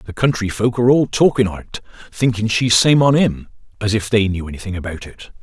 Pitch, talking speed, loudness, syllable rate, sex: 110 Hz, 210 wpm, -17 LUFS, 5.5 syllables/s, male